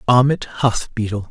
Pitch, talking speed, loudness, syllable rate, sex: 115 Hz, 140 wpm, -19 LUFS, 4.7 syllables/s, male